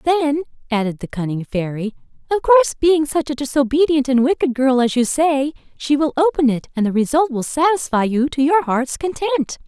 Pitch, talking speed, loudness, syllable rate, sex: 280 Hz, 190 wpm, -18 LUFS, 5.3 syllables/s, female